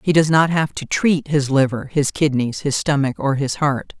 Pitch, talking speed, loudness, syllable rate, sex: 145 Hz, 225 wpm, -18 LUFS, 4.6 syllables/s, female